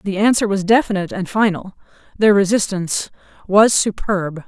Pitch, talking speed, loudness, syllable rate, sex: 195 Hz, 135 wpm, -17 LUFS, 5.1 syllables/s, female